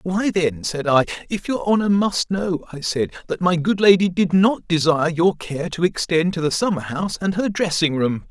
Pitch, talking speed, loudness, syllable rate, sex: 175 Hz, 215 wpm, -20 LUFS, 5.0 syllables/s, male